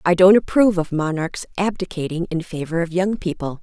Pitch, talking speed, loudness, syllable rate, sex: 175 Hz, 180 wpm, -20 LUFS, 5.6 syllables/s, female